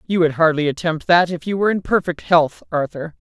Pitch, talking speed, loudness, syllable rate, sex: 165 Hz, 215 wpm, -18 LUFS, 5.7 syllables/s, female